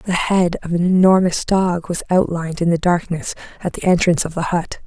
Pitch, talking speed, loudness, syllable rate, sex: 175 Hz, 210 wpm, -18 LUFS, 5.5 syllables/s, female